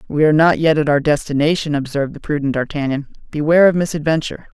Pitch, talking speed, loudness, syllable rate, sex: 150 Hz, 185 wpm, -16 LUFS, 7.0 syllables/s, male